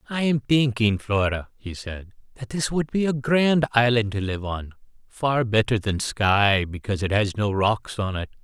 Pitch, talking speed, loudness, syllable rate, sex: 115 Hz, 185 wpm, -23 LUFS, 4.5 syllables/s, male